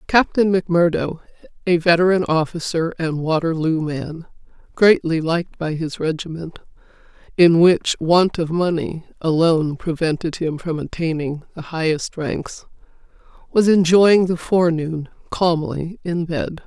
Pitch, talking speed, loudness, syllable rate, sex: 165 Hz, 120 wpm, -19 LUFS, 4.4 syllables/s, female